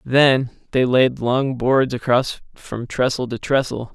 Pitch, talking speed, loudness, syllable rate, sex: 125 Hz, 150 wpm, -19 LUFS, 3.7 syllables/s, male